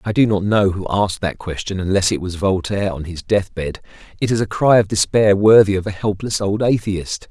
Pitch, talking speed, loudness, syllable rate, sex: 100 Hz, 230 wpm, -18 LUFS, 5.5 syllables/s, male